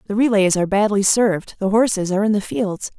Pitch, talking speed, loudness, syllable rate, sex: 205 Hz, 220 wpm, -18 LUFS, 6.3 syllables/s, female